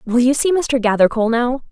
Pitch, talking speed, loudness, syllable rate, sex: 250 Hz, 210 wpm, -16 LUFS, 5.8 syllables/s, female